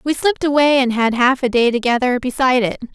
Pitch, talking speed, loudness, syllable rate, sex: 255 Hz, 225 wpm, -16 LUFS, 6.3 syllables/s, female